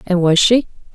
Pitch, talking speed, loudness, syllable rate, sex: 195 Hz, 190 wpm, -14 LUFS, 5.0 syllables/s, female